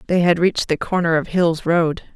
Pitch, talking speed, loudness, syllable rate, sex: 170 Hz, 220 wpm, -18 LUFS, 5.3 syllables/s, female